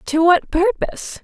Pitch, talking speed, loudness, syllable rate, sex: 360 Hz, 145 wpm, -17 LUFS, 4.4 syllables/s, female